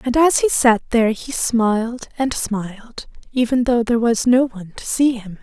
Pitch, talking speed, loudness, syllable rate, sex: 235 Hz, 200 wpm, -18 LUFS, 4.9 syllables/s, female